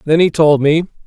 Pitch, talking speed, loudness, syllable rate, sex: 155 Hz, 225 wpm, -13 LUFS, 5.4 syllables/s, male